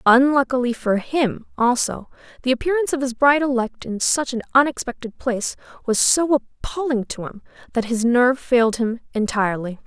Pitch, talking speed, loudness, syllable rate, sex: 250 Hz, 160 wpm, -20 LUFS, 5.5 syllables/s, female